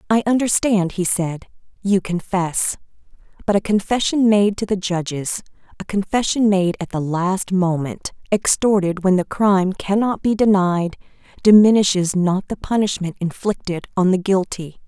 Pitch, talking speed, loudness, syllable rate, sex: 195 Hz, 140 wpm, -19 LUFS, 4.6 syllables/s, female